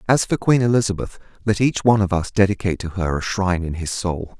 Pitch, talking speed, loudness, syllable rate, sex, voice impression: 100 Hz, 230 wpm, -20 LUFS, 6.4 syllables/s, male, masculine, adult-like, weak, slightly dark, fluent, slightly cool, intellectual, sincere, calm, slightly friendly, slightly wild, kind, modest